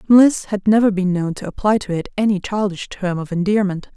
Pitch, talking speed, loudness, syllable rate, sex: 195 Hz, 210 wpm, -18 LUFS, 5.5 syllables/s, female